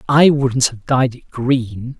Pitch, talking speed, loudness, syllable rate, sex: 130 Hz, 180 wpm, -16 LUFS, 3.3 syllables/s, male